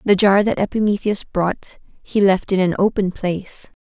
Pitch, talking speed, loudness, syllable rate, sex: 195 Hz, 175 wpm, -18 LUFS, 4.6 syllables/s, female